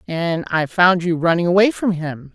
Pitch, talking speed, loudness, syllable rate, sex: 175 Hz, 205 wpm, -17 LUFS, 4.6 syllables/s, female